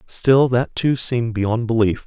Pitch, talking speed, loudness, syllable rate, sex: 120 Hz, 175 wpm, -18 LUFS, 4.2 syllables/s, male